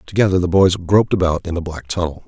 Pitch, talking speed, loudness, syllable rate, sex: 90 Hz, 235 wpm, -17 LUFS, 6.5 syllables/s, male